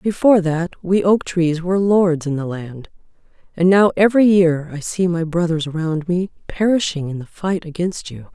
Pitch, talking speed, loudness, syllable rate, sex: 175 Hz, 185 wpm, -18 LUFS, 4.9 syllables/s, female